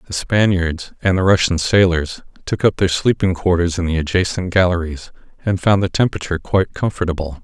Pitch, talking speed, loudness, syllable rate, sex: 90 Hz, 170 wpm, -17 LUFS, 5.7 syllables/s, male